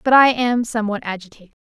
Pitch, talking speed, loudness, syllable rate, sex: 225 Hz, 185 wpm, -18 LUFS, 7.0 syllables/s, female